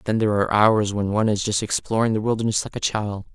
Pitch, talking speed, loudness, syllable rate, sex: 105 Hz, 250 wpm, -21 LUFS, 6.7 syllables/s, male